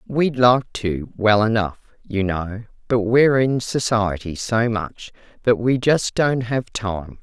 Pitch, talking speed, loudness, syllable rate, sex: 115 Hz, 160 wpm, -20 LUFS, 3.6 syllables/s, female